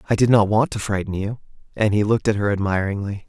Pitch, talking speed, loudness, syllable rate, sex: 105 Hz, 240 wpm, -20 LUFS, 6.6 syllables/s, male